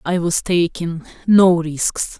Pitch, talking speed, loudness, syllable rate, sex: 170 Hz, 135 wpm, -17 LUFS, 3.3 syllables/s, female